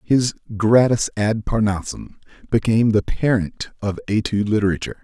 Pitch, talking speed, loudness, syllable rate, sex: 105 Hz, 120 wpm, -20 LUFS, 5.4 syllables/s, male